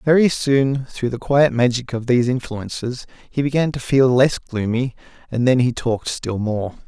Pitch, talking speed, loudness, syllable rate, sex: 125 Hz, 185 wpm, -19 LUFS, 4.7 syllables/s, male